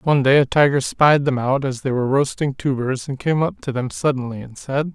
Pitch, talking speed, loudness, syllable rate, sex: 135 Hz, 245 wpm, -19 LUFS, 5.5 syllables/s, male